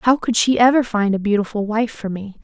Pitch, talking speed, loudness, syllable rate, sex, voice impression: 220 Hz, 245 wpm, -18 LUFS, 5.6 syllables/s, female, feminine, slightly adult-like, cute, slightly refreshing, slightly friendly